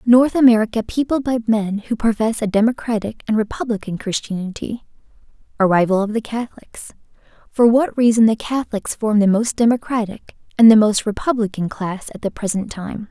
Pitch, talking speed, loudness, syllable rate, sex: 220 Hz, 145 wpm, -18 LUFS, 5.6 syllables/s, female